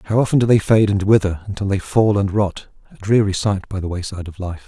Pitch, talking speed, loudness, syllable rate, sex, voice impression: 100 Hz, 255 wpm, -18 LUFS, 6.1 syllables/s, male, very masculine, very middle-aged, very thick, slightly tensed, very powerful, dark, soft, slightly muffled, fluent, slightly raspy, cool, intellectual, slightly refreshing, very sincere, very calm, very mature, very friendly, reassuring, unique, slightly elegant, wild, sweet, slightly lively, kind, modest